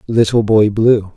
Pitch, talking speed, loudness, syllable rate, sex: 110 Hz, 155 wpm, -13 LUFS, 4.0 syllables/s, male